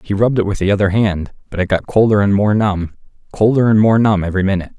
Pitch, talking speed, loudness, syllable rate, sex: 100 Hz, 250 wpm, -15 LUFS, 6.8 syllables/s, male